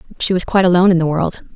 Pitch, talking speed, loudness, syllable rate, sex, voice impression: 175 Hz, 270 wpm, -15 LUFS, 8.8 syllables/s, female, very feminine, young, very thin, slightly relaxed, slightly weak, slightly bright, soft, clear, fluent, slightly raspy, very cute, intellectual, very refreshing, very sincere, calm, friendly, reassuring, slightly unique, elegant, very sweet, slightly lively, very kind, modest